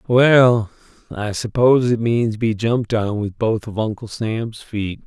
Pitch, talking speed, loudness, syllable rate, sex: 115 Hz, 165 wpm, -18 LUFS, 4.0 syllables/s, male